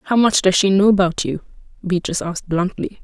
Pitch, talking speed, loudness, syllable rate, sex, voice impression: 190 Hz, 200 wpm, -17 LUFS, 6.2 syllables/s, female, feminine, adult-like, slightly muffled, calm, slightly strict